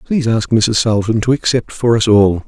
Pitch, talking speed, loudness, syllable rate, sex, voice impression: 110 Hz, 220 wpm, -14 LUFS, 5.1 syllables/s, male, very masculine, middle-aged, slightly thick, calm, slightly mature, reassuring, slightly sweet